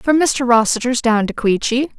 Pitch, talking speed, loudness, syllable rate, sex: 245 Hz, 180 wpm, -16 LUFS, 4.7 syllables/s, female